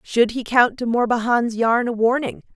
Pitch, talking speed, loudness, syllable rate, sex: 235 Hz, 190 wpm, -19 LUFS, 4.7 syllables/s, female